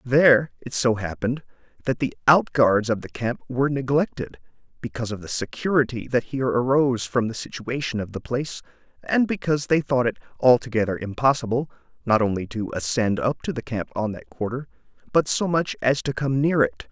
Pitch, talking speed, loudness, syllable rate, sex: 125 Hz, 185 wpm, -23 LUFS, 5.6 syllables/s, male